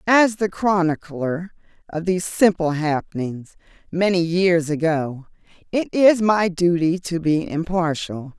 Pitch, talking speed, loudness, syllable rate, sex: 175 Hz, 120 wpm, -20 LUFS, 4.0 syllables/s, female